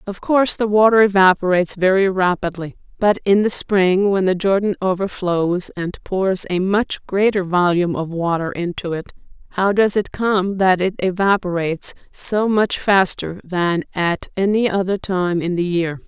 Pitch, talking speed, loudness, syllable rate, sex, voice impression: 190 Hz, 160 wpm, -18 LUFS, 4.6 syllables/s, female, very feminine, very middle-aged, slightly thin, tensed, powerful, slightly bright, slightly hard, very clear, fluent, cool, intellectual, refreshing, very sincere, very calm, slightly friendly, very reassuring, slightly unique, elegant, slightly wild, slightly sweet, slightly lively, kind, slightly sharp